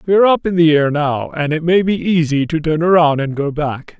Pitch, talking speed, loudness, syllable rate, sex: 160 Hz, 255 wpm, -15 LUFS, 5.2 syllables/s, male